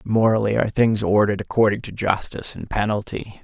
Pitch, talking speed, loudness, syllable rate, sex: 105 Hz, 155 wpm, -21 LUFS, 6.0 syllables/s, male